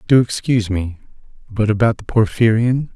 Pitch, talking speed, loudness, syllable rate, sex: 110 Hz, 140 wpm, -17 LUFS, 5.3 syllables/s, male